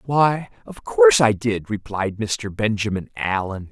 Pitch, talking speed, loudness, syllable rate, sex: 120 Hz, 145 wpm, -20 LUFS, 4.1 syllables/s, male